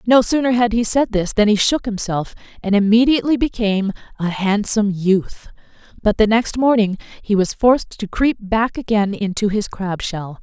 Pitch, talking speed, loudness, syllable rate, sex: 215 Hz, 180 wpm, -18 LUFS, 5.0 syllables/s, female